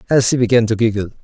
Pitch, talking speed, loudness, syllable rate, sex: 115 Hz, 195 wpm, -15 LUFS, 7.4 syllables/s, male